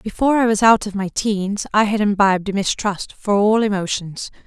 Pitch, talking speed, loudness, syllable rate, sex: 205 Hz, 200 wpm, -18 LUFS, 5.2 syllables/s, female